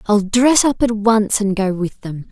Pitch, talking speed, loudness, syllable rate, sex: 215 Hz, 235 wpm, -16 LUFS, 4.2 syllables/s, female